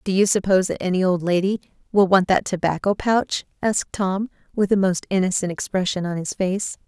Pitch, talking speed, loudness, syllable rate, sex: 190 Hz, 190 wpm, -21 LUFS, 5.4 syllables/s, female